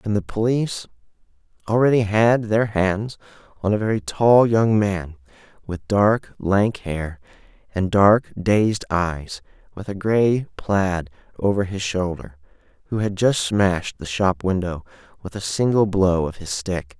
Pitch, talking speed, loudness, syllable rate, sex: 100 Hz, 150 wpm, -20 LUFS, 4.0 syllables/s, male